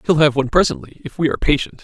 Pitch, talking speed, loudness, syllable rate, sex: 150 Hz, 260 wpm, -17 LUFS, 8.2 syllables/s, male